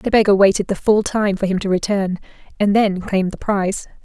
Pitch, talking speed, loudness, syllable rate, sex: 200 Hz, 225 wpm, -18 LUFS, 5.8 syllables/s, female